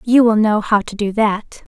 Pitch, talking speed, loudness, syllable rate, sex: 215 Hz, 240 wpm, -16 LUFS, 4.5 syllables/s, female